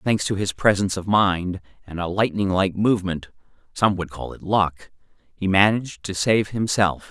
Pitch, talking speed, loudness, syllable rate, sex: 95 Hz, 175 wpm, -22 LUFS, 4.8 syllables/s, male